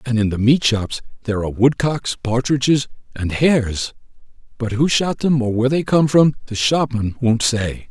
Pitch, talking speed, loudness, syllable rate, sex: 125 Hz, 180 wpm, -18 LUFS, 4.9 syllables/s, male